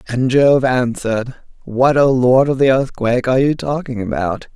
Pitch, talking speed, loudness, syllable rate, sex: 130 Hz, 170 wpm, -15 LUFS, 5.0 syllables/s, female